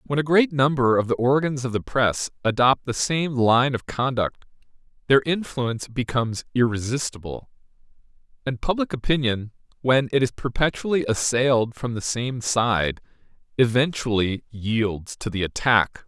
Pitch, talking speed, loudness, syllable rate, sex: 125 Hz, 140 wpm, -22 LUFS, 4.6 syllables/s, male